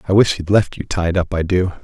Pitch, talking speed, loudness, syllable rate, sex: 90 Hz, 295 wpm, -17 LUFS, 5.6 syllables/s, male